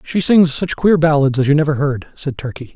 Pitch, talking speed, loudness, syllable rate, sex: 150 Hz, 240 wpm, -15 LUFS, 5.4 syllables/s, male